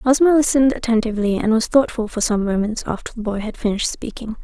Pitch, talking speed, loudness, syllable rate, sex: 230 Hz, 205 wpm, -19 LUFS, 6.6 syllables/s, female